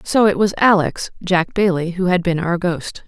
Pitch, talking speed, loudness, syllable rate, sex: 180 Hz, 215 wpm, -17 LUFS, 4.6 syllables/s, female